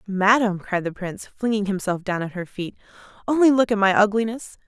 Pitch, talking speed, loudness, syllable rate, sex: 205 Hz, 195 wpm, -21 LUFS, 5.6 syllables/s, female